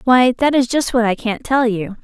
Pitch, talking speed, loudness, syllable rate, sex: 240 Hz, 265 wpm, -16 LUFS, 4.9 syllables/s, female